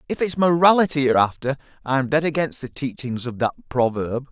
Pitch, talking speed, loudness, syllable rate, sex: 135 Hz, 195 wpm, -21 LUFS, 5.7 syllables/s, male